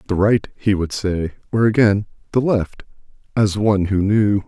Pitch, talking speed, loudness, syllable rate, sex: 100 Hz, 175 wpm, -18 LUFS, 4.7 syllables/s, male